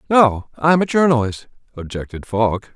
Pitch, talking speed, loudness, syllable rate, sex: 130 Hz, 130 wpm, -18 LUFS, 4.6 syllables/s, male